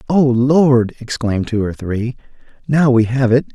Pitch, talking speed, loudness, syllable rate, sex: 125 Hz, 170 wpm, -15 LUFS, 4.4 syllables/s, male